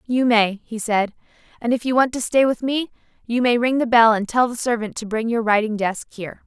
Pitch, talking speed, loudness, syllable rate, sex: 230 Hz, 250 wpm, -20 LUFS, 5.5 syllables/s, female